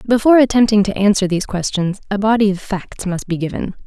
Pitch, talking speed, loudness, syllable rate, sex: 205 Hz, 200 wpm, -16 LUFS, 6.3 syllables/s, female